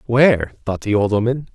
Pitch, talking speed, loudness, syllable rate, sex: 115 Hz, 195 wpm, -18 LUFS, 5.5 syllables/s, male